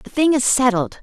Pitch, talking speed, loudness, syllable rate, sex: 245 Hz, 235 wpm, -17 LUFS, 5.1 syllables/s, female